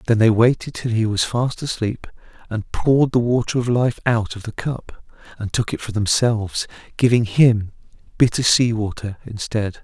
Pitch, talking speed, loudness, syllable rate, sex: 115 Hz, 175 wpm, -19 LUFS, 4.8 syllables/s, male